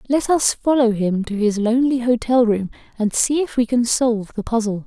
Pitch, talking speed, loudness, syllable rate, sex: 235 Hz, 210 wpm, -19 LUFS, 5.2 syllables/s, female